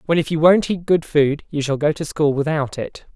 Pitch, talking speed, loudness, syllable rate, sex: 155 Hz, 265 wpm, -19 LUFS, 5.2 syllables/s, male